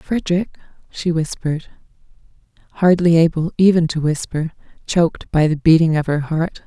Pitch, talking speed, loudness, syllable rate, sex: 165 Hz, 135 wpm, -17 LUFS, 5.1 syllables/s, female